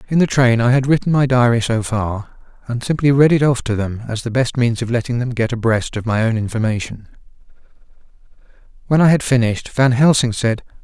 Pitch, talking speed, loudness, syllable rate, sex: 120 Hz, 205 wpm, -17 LUFS, 5.7 syllables/s, male